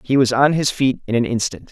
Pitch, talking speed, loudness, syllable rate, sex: 130 Hz, 280 wpm, -18 LUFS, 5.7 syllables/s, male